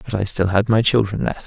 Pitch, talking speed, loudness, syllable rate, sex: 105 Hz, 285 wpm, -18 LUFS, 5.8 syllables/s, male